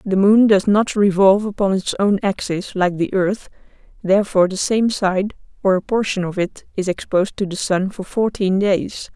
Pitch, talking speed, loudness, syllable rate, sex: 195 Hz, 190 wpm, -18 LUFS, 5.0 syllables/s, female